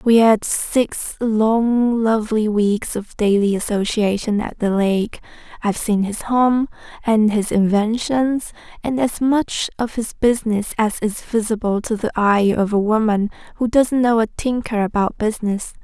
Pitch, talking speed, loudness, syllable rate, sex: 220 Hz, 155 wpm, -19 LUFS, 4.2 syllables/s, female